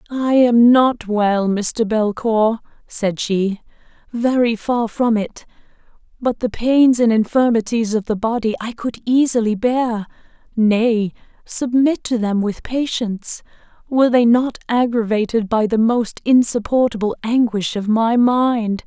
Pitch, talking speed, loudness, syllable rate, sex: 230 Hz, 135 wpm, -17 LUFS, 4.0 syllables/s, female